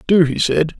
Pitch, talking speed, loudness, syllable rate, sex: 165 Hz, 225 wpm, -16 LUFS, 4.8 syllables/s, male